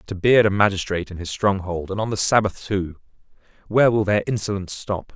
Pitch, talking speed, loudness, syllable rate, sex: 100 Hz, 200 wpm, -21 LUFS, 6.0 syllables/s, male